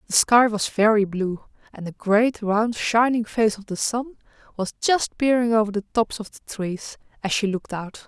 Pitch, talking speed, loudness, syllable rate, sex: 220 Hz, 200 wpm, -22 LUFS, 4.6 syllables/s, female